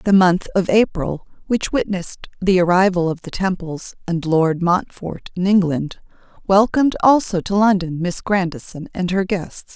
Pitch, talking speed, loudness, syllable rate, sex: 185 Hz, 155 wpm, -18 LUFS, 4.5 syllables/s, female